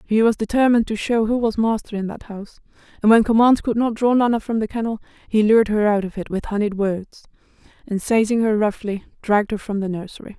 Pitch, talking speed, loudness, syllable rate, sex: 215 Hz, 225 wpm, -19 LUFS, 6.2 syllables/s, female